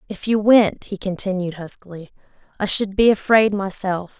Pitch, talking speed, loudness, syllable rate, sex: 200 Hz, 155 wpm, -19 LUFS, 4.8 syllables/s, female